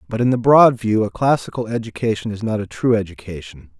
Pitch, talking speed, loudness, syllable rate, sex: 110 Hz, 205 wpm, -18 LUFS, 5.9 syllables/s, male